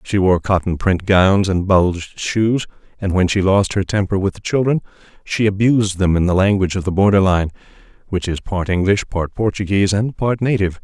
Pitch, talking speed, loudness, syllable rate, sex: 95 Hz, 190 wpm, -17 LUFS, 5.5 syllables/s, male